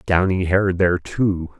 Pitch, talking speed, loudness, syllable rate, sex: 90 Hz, 150 wpm, -19 LUFS, 4.1 syllables/s, male